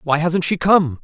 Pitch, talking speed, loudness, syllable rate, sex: 165 Hz, 230 wpm, -17 LUFS, 4.4 syllables/s, male